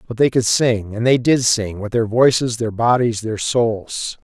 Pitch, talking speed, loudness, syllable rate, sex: 115 Hz, 210 wpm, -17 LUFS, 4.2 syllables/s, male